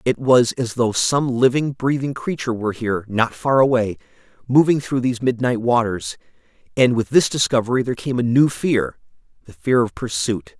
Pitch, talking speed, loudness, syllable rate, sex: 125 Hz, 170 wpm, -19 LUFS, 5.3 syllables/s, male